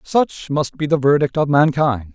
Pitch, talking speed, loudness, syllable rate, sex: 145 Hz, 195 wpm, -17 LUFS, 4.4 syllables/s, male